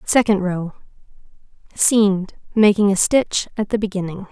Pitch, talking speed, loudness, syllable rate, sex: 200 Hz, 110 wpm, -18 LUFS, 4.7 syllables/s, female